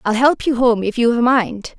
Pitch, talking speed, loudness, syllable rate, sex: 240 Hz, 270 wpm, -16 LUFS, 5.3 syllables/s, female